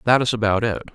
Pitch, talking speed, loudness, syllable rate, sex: 115 Hz, 255 wpm, -20 LUFS, 6.9 syllables/s, male